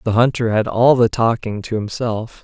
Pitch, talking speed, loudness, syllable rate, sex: 115 Hz, 195 wpm, -17 LUFS, 4.8 syllables/s, male